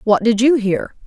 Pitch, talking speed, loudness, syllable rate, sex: 230 Hz, 225 wpm, -16 LUFS, 4.6 syllables/s, female